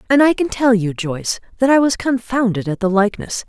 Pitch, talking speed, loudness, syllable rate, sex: 225 Hz, 225 wpm, -17 LUFS, 5.9 syllables/s, female